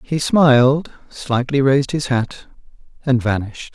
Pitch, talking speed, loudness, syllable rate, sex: 135 Hz, 130 wpm, -17 LUFS, 4.5 syllables/s, male